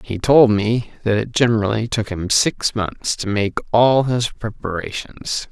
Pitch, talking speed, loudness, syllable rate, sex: 110 Hz, 165 wpm, -18 LUFS, 4.1 syllables/s, male